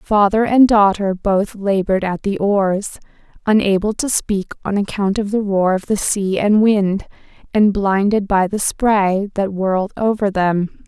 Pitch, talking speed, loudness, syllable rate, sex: 200 Hz, 165 wpm, -17 LUFS, 4.2 syllables/s, female